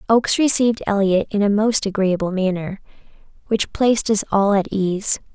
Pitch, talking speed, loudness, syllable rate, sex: 205 Hz, 155 wpm, -18 LUFS, 5.3 syllables/s, female